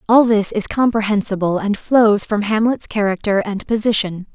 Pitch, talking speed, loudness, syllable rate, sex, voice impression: 210 Hz, 150 wpm, -17 LUFS, 4.9 syllables/s, female, very feminine, slightly adult-like, fluent, slightly cute, slightly sincere, friendly